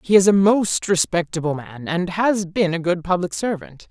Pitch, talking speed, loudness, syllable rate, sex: 180 Hz, 200 wpm, -20 LUFS, 4.7 syllables/s, female